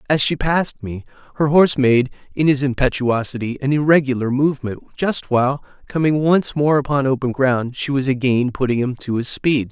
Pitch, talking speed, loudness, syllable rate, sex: 135 Hz, 180 wpm, -18 LUFS, 5.3 syllables/s, male